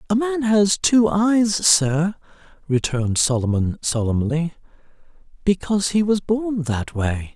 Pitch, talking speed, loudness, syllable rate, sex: 170 Hz, 120 wpm, -20 LUFS, 4.0 syllables/s, male